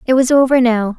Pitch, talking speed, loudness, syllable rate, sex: 250 Hz, 245 wpm, -13 LUFS, 5.9 syllables/s, female